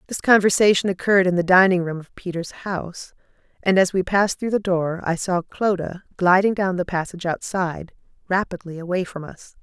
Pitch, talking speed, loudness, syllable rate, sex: 185 Hz, 170 wpm, -21 LUFS, 5.7 syllables/s, female